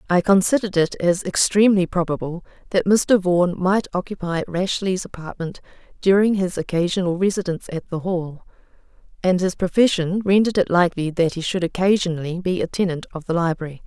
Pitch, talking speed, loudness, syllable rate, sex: 180 Hz, 155 wpm, -20 LUFS, 5.8 syllables/s, female